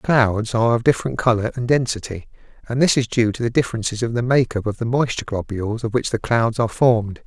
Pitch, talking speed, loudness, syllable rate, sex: 115 Hz, 225 wpm, -20 LUFS, 6.3 syllables/s, male